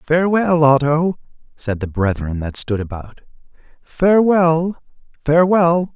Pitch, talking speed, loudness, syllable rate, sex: 150 Hz, 100 wpm, -16 LUFS, 4.2 syllables/s, male